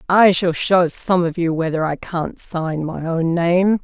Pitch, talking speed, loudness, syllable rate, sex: 170 Hz, 205 wpm, -18 LUFS, 3.8 syllables/s, female